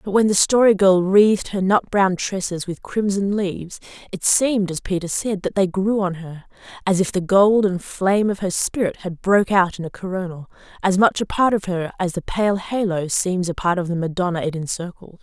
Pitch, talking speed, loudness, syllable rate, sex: 190 Hz, 215 wpm, -20 LUFS, 5.2 syllables/s, female